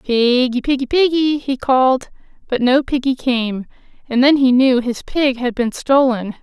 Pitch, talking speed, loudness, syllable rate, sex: 260 Hz, 170 wpm, -16 LUFS, 4.4 syllables/s, female